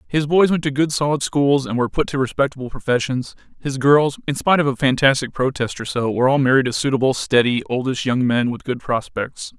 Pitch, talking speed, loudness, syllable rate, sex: 135 Hz, 220 wpm, -19 LUFS, 5.9 syllables/s, male